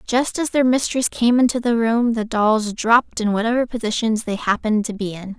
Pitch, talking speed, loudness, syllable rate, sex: 230 Hz, 210 wpm, -19 LUFS, 5.3 syllables/s, female